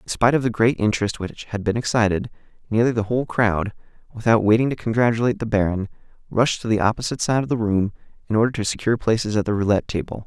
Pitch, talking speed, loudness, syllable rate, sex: 110 Hz, 215 wpm, -21 LUFS, 7.1 syllables/s, male